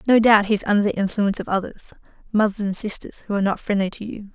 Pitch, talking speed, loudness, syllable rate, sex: 205 Hz, 220 wpm, -21 LUFS, 6.9 syllables/s, female